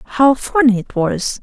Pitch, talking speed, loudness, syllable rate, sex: 240 Hz, 170 wpm, -15 LUFS, 3.6 syllables/s, female